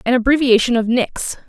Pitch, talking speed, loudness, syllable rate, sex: 245 Hz, 160 wpm, -16 LUFS, 5.4 syllables/s, female